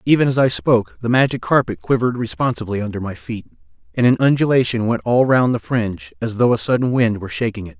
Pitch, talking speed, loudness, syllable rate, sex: 120 Hz, 215 wpm, -18 LUFS, 6.5 syllables/s, male